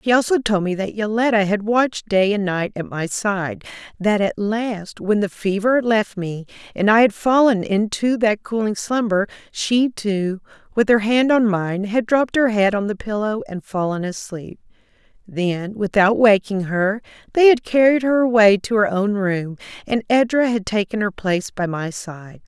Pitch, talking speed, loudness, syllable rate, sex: 210 Hz, 185 wpm, -19 LUFS, 4.5 syllables/s, female